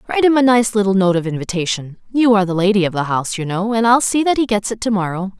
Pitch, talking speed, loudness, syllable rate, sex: 205 Hz, 255 wpm, -16 LUFS, 7.0 syllables/s, female